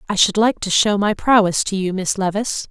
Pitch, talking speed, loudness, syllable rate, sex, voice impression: 200 Hz, 245 wpm, -17 LUFS, 5.5 syllables/s, female, feminine, adult-like, fluent, slightly refreshing, slightly friendly, slightly lively